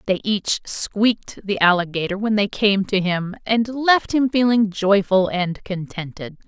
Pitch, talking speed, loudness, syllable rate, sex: 205 Hz, 160 wpm, -20 LUFS, 4.1 syllables/s, female